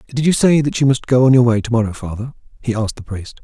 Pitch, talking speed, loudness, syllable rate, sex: 120 Hz, 295 wpm, -16 LUFS, 6.7 syllables/s, male